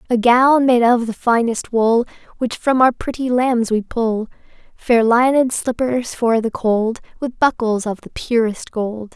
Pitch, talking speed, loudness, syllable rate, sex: 235 Hz, 170 wpm, -17 LUFS, 4.0 syllables/s, female